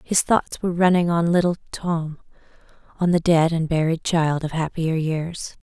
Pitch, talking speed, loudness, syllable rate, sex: 165 Hz, 170 wpm, -21 LUFS, 4.6 syllables/s, female